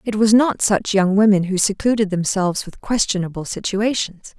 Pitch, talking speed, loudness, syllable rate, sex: 200 Hz, 165 wpm, -18 LUFS, 5.1 syllables/s, female